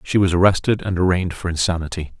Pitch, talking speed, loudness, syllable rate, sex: 90 Hz, 190 wpm, -19 LUFS, 6.8 syllables/s, male